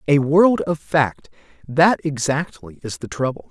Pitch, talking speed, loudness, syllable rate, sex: 145 Hz, 135 wpm, -19 LUFS, 4.1 syllables/s, male